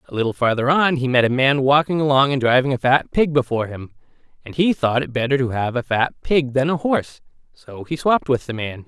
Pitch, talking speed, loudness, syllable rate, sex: 135 Hz, 245 wpm, -19 LUFS, 5.9 syllables/s, male